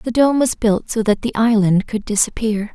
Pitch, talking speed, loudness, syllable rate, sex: 220 Hz, 220 wpm, -17 LUFS, 4.9 syllables/s, female